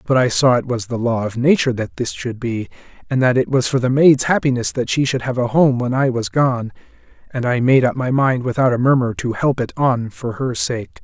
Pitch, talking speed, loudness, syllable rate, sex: 125 Hz, 255 wpm, -17 LUFS, 5.4 syllables/s, male